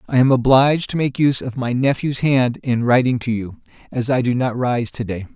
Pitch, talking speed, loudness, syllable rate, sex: 125 Hz, 235 wpm, -18 LUFS, 5.4 syllables/s, male